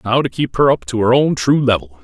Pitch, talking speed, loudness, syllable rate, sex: 125 Hz, 295 wpm, -15 LUFS, 5.7 syllables/s, male